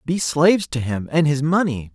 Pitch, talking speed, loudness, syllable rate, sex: 150 Hz, 215 wpm, -19 LUFS, 5.0 syllables/s, male